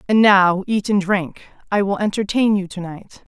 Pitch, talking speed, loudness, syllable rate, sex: 200 Hz, 195 wpm, -18 LUFS, 4.6 syllables/s, female